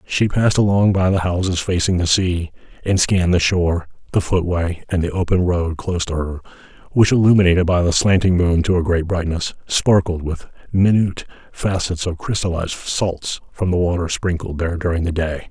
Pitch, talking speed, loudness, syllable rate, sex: 90 Hz, 180 wpm, -18 LUFS, 5.5 syllables/s, male